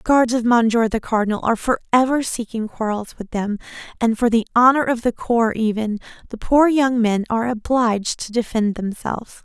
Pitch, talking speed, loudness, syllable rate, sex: 230 Hz, 185 wpm, -19 LUFS, 5.4 syllables/s, female